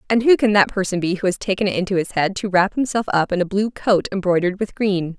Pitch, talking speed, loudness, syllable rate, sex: 195 Hz, 280 wpm, -19 LUFS, 6.3 syllables/s, female